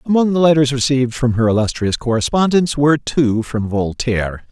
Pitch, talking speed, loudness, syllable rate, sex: 130 Hz, 160 wpm, -16 LUFS, 5.5 syllables/s, male